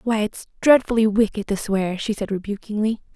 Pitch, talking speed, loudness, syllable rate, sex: 210 Hz, 170 wpm, -21 LUFS, 5.4 syllables/s, female